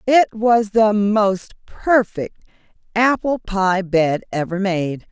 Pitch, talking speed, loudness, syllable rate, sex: 205 Hz, 115 wpm, -18 LUFS, 3.2 syllables/s, female